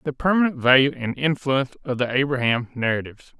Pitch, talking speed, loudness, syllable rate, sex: 135 Hz, 160 wpm, -21 LUFS, 6.2 syllables/s, male